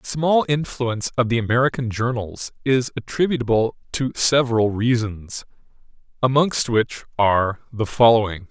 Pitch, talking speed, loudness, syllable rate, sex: 120 Hz, 120 wpm, -20 LUFS, 4.8 syllables/s, male